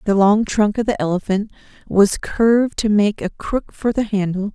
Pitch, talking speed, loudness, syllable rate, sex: 210 Hz, 200 wpm, -18 LUFS, 4.7 syllables/s, female